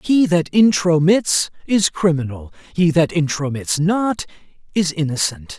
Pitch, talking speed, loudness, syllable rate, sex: 165 Hz, 120 wpm, -18 LUFS, 4.1 syllables/s, male